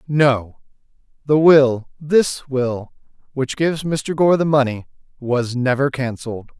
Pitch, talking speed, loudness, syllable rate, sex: 135 Hz, 110 wpm, -18 LUFS, 4.0 syllables/s, male